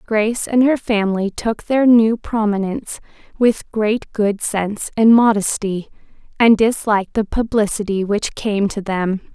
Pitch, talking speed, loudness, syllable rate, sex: 215 Hz, 140 wpm, -17 LUFS, 4.4 syllables/s, female